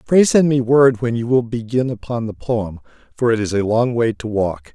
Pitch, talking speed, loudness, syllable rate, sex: 120 Hz, 240 wpm, -18 LUFS, 4.9 syllables/s, male